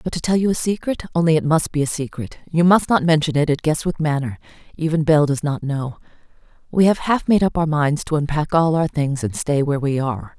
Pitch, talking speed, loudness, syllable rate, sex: 155 Hz, 230 wpm, -19 LUFS, 5.8 syllables/s, female